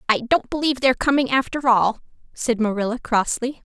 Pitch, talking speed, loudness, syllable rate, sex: 245 Hz, 160 wpm, -20 LUFS, 5.8 syllables/s, female